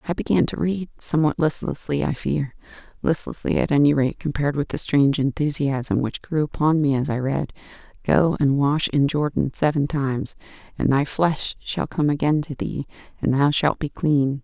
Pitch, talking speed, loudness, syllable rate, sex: 145 Hz, 180 wpm, -22 LUFS, 5.0 syllables/s, female